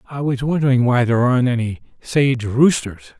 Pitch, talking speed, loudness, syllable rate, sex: 125 Hz, 170 wpm, -17 LUFS, 5.2 syllables/s, male